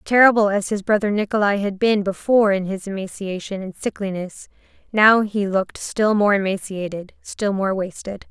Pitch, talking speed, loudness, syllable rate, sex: 200 Hz, 160 wpm, -20 LUFS, 5.1 syllables/s, female